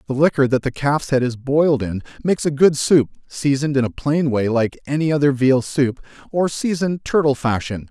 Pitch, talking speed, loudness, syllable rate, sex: 140 Hz, 205 wpm, -19 LUFS, 5.5 syllables/s, male